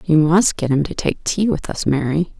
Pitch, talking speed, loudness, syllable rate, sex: 160 Hz, 250 wpm, -18 LUFS, 4.9 syllables/s, female